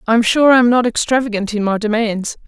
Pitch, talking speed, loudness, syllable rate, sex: 225 Hz, 240 wpm, -15 LUFS, 6.3 syllables/s, female